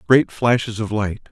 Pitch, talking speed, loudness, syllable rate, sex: 110 Hz, 180 wpm, -19 LUFS, 4.6 syllables/s, male